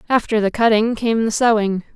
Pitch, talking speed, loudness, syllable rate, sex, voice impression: 220 Hz, 185 wpm, -17 LUFS, 5.3 syllables/s, female, very feminine, adult-like, slightly intellectual